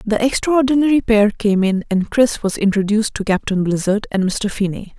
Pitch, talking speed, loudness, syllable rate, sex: 215 Hz, 180 wpm, -17 LUFS, 5.3 syllables/s, female